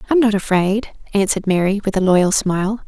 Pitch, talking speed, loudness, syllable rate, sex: 200 Hz, 190 wpm, -17 LUFS, 5.8 syllables/s, female